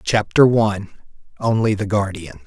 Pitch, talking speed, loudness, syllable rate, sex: 105 Hz, 120 wpm, -18 LUFS, 4.9 syllables/s, male